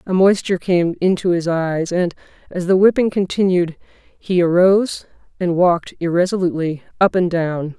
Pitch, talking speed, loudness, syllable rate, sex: 180 Hz, 145 wpm, -17 LUFS, 5.1 syllables/s, female